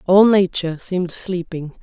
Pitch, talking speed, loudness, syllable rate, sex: 180 Hz, 130 wpm, -18 LUFS, 4.9 syllables/s, female